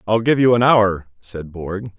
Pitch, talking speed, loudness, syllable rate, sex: 100 Hz, 210 wpm, -16 LUFS, 4.2 syllables/s, male